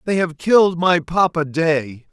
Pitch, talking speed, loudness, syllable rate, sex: 165 Hz, 170 wpm, -17 LUFS, 4.1 syllables/s, male